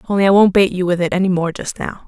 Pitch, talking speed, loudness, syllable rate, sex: 185 Hz, 320 wpm, -15 LUFS, 6.9 syllables/s, female